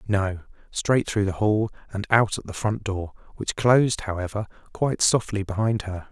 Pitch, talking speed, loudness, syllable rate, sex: 105 Hz, 175 wpm, -24 LUFS, 4.9 syllables/s, male